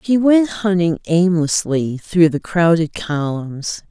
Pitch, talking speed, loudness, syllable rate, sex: 170 Hz, 125 wpm, -17 LUFS, 3.5 syllables/s, female